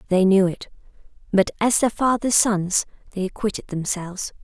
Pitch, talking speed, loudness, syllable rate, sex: 200 Hz, 150 wpm, -21 LUFS, 5.1 syllables/s, female